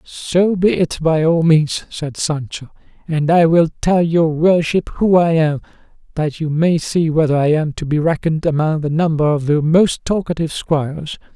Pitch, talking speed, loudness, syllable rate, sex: 160 Hz, 185 wpm, -16 LUFS, 4.6 syllables/s, male